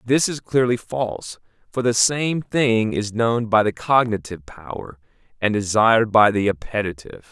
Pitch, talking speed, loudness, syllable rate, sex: 110 Hz, 155 wpm, -20 LUFS, 4.8 syllables/s, male